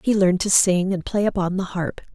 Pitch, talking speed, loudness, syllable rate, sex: 185 Hz, 250 wpm, -20 LUFS, 5.7 syllables/s, female